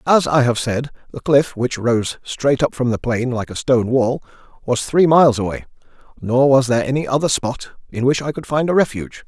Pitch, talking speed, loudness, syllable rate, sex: 130 Hz, 220 wpm, -18 LUFS, 5.5 syllables/s, male